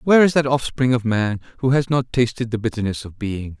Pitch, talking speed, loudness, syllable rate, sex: 120 Hz, 235 wpm, -20 LUFS, 5.7 syllables/s, male